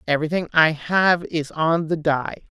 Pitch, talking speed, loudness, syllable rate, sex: 160 Hz, 160 wpm, -20 LUFS, 4.5 syllables/s, female